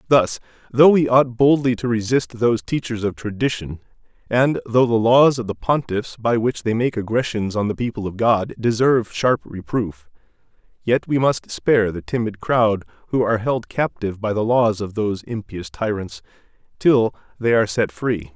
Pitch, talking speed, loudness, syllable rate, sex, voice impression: 115 Hz, 175 wpm, -20 LUFS, 4.9 syllables/s, male, masculine, middle-aged, thick, tensed, powerful, hard, fluent, cool, intellectual, slightly mature, wild, lively, strict, intense, slightly sharp